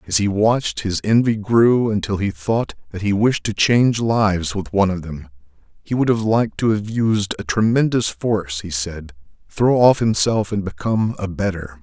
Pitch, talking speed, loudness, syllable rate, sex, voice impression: 105 Hz, 195 wpm, -19 LUFS, 4.9 syllables/s, male, very masculine, very adult-like, slightly old, very thick, tensed, very powerful, bright, slightly hard, clear, fluent, slightly raspy, very cool, intellectual, sincere, very calm, very mature, very friendly, very reassuring, unique, elegant, very wild, sweet, slightly lively, very kind, slightly modest